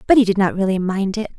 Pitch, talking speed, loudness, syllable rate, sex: 200 Hz, 305 wpm, -18 LUFS, 7.1 syllables/s, female